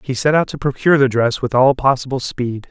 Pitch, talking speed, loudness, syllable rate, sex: 130 Hz, 245 wpm, -16 LUFS, 5.8 syllables/s, male